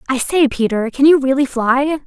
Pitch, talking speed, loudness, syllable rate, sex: 270 Hz, 205 wpm, -15 LUFS, 5.0 syllables/s, female